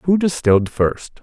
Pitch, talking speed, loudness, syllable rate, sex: 140 Hz, 145 wpm, -17 LUFS, 4.2 syllables/s, male